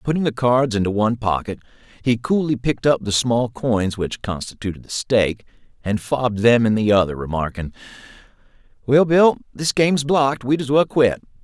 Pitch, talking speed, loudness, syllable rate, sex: 120 Hz, 175 wpm, -19 LUFS, 5.4 syllables/s, male